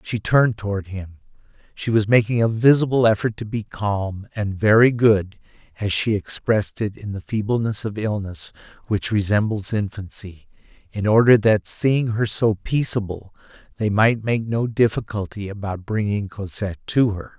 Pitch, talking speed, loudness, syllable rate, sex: 105 Hz, 155 wpm, -21 LUFS, 4.8 syllables/s, male